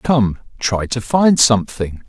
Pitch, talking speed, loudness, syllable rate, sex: 120 Hz, 145 wpm, -16 LUFS, 3.8 syllables/s, male